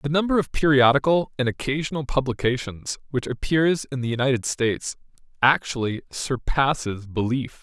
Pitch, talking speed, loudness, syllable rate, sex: 135 Hz, 125 wpm, -23 LUFS, 5.1 syllables/s, male